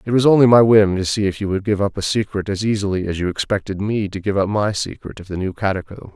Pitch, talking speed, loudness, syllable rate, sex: 100 Hz, 285 wpm, -18 LUFS, 6.3 syllables/s, male